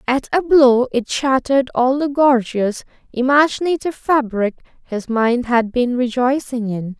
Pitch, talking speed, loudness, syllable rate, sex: 255 Hz, 135 wpm, -17 LUFS, 4.3 syllables/s, female